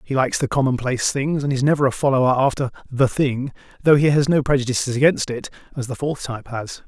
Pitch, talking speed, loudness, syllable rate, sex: 135 Hz, 220 wpm, -20 LUFS, 6.4 syllables/s, male